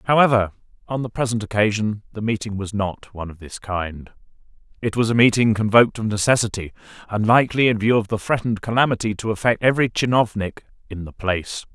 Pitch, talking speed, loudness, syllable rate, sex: 110 Hz, 180 wpm, -20 LUFS, 6.2 syllables/s, male